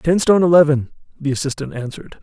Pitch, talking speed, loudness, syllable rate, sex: 150 Hz, 160 wpm, -17 LUFS, 6.8 syllables/s, male